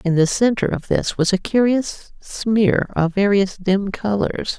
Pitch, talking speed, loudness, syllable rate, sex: 200 Hz, 170 wpm, -19 LUFS, 3.9 syllables/s, female